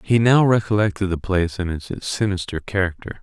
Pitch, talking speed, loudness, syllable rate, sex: 95 Hz, 165 wpm, -20 LUFS, 5.6 syllables/s, male